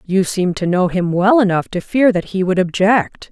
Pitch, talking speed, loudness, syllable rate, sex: 190 Hz, 235 wpm, -16 LUFS, 4.7 syllables/s, female